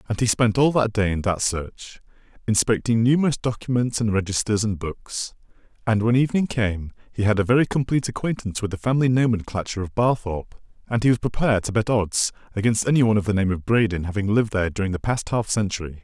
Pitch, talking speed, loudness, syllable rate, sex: 110 Hz, 205 wpm, -22 LUFS, 6.5 syllables/s, male